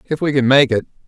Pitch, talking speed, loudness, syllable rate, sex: 135 Hz, 280 wpm, -15 LUFS, 6.5 syllables/s, male